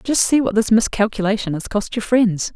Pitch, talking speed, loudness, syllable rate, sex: 215 Hz, 210 wpm, -18 LUFS, 5.3 syllables/s, female